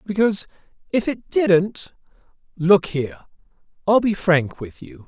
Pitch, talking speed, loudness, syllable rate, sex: 180 Hz, 130 wpm, -20 LUFS, 4.5 syllables/s, male